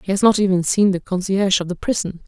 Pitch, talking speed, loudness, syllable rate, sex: 190 Hz, 265 wpm, -18 LUFS, 6.5 syllables/s, female